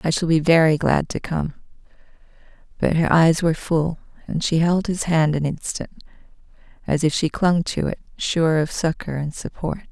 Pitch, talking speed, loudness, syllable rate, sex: 160 Hz, 180 wpm, -21 LUFS, 4.9 syllables/s, female